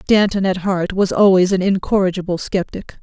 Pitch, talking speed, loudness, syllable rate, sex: 190 Hz, 160 wpm, -17 LUFS, 5.2 syllables/s, female